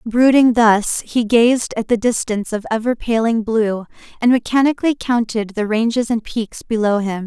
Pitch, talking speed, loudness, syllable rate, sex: 225 Hz, 165 wpm, -17 LUFS, 4.7 syllables/s, female